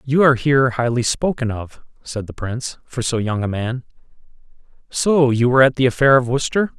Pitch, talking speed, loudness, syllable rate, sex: 125 Hz, 195 wpm, -18 LUFS, 5.8 syllables/s, male